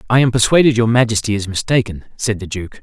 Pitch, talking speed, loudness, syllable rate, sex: 110 Hz, 215 wpm, -16 LUFS, 6.3 syllables/s, male